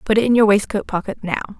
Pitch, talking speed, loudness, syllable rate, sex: 210 Hz, 265 wpm, -18 LUFS, 6.9 syllables/s, female